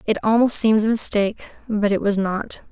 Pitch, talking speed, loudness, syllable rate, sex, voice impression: 210 Hz, 200 wpm, -19 LUFS, 5.3 syllables/s, female, feminine, slightly young, slightly refreshing, sincere, friendly, slightly kind